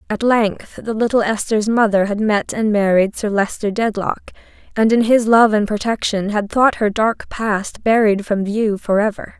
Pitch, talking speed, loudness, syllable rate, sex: 215 Hz, 185 wpm, -17 LUFS, 4.6 syllables/s, female